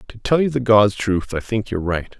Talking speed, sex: 275 wpm, male